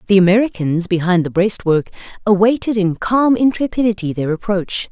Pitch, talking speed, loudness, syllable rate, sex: 200 Hz, 135 wpm, -16 LUFS, 5.3 syllables/s, female